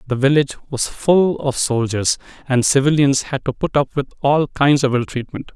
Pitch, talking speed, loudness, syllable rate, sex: 135 Hz, 195 wpm, -18 LUFS, 5.0 syllables/s, male